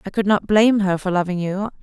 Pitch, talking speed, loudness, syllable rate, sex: 195 Hz, 265 wpm, -19 LUFS, 6.2 syllables/s, female